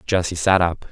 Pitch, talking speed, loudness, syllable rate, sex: 90 Hz, 195 wpm, -19 LUFS, 5.2 syllables/s, male